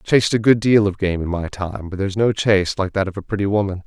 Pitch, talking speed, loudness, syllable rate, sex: 100 Hz, 310 wpm, -19 LUFS, 6.8 syllables/s, male